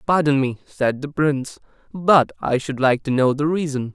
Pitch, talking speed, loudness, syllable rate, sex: 145 Hz, 200 wpm, -20 LUFS, 4.8 syllables/s, male